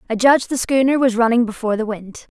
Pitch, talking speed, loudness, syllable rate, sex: 240 Hz, 230 wpm, -17 LUFS, 6.7 syllables/s, female